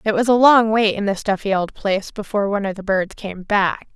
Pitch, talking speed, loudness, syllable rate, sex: 205 Hz, 260 wpm, -18 LUFS, 5.8 syllables/s, female